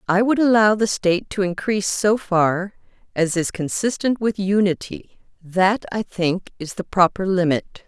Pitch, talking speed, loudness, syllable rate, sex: 195 Hz, 160 wpm, -20 LUFS, 4.5 syllables/s, female